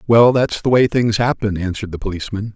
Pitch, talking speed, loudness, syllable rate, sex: 105 Hz, 210 wpm, -17 LUFS, 6.3 syllables/s, male